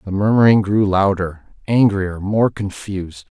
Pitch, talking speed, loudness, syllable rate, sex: 100 Hz, 125 wpm, -17 LUFS, 4.3 syllables/s, male